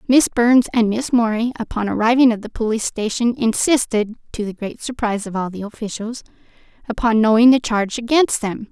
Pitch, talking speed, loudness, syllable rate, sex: 230 Hz, 180 wpm, -18 LUFS, 5.7 syllables/s, female